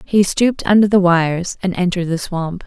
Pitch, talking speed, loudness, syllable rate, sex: 185 Hz, 205 wpm, -16 LUFS, 5.6 syllables/s, female